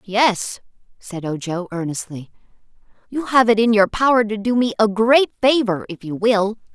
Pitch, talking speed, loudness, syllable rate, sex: 215 Hz, 170 wpm, -18 LUFS, 4.7 syllables/s, female